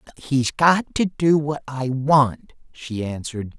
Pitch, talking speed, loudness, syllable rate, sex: 140 Hz, 150 wpm, -21 LUFS, 3.8 syllables/s, male